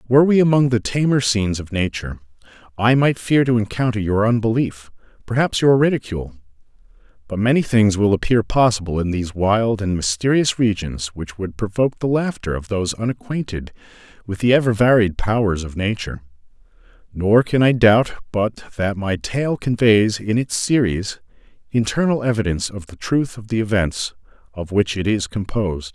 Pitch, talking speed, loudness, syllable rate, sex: 110 Hz, 160 wpm, -19 LUFS, 5.3 syllables/s, male